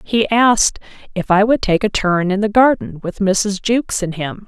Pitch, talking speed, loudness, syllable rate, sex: 200 Hz, 215 wpm, -16 LUFS, 4.8 syllables/s, female